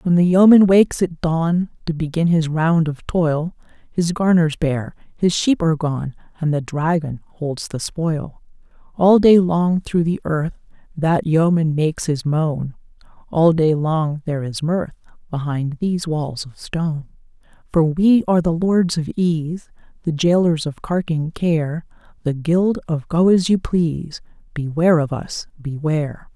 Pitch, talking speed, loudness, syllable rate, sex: 160 Hz, 160 wpm, -19 LUFS, 4.2 syllables/s, female